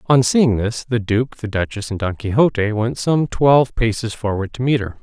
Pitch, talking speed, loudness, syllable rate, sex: 115 Hz, 215 wpm, -18 LUFS, 5.0 syllables/s, male